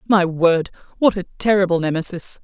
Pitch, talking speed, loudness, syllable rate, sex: 180 Hz, 150 wpm, -18 LUFS, 5.4 syllables/s, female